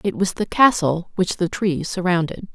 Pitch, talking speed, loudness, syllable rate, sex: 180 Hz, 190 wpm, -20 LUFS, 4.7 syllables/s, female